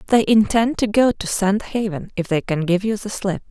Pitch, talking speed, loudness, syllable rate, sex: 205 Hz, 240 wpm, -19 LUFS, 5.0 syllables/s, female